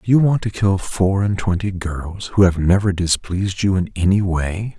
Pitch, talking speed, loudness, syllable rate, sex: 95 Hz, 215 wpm, -18 LUFS, 4.8 syllables/s, male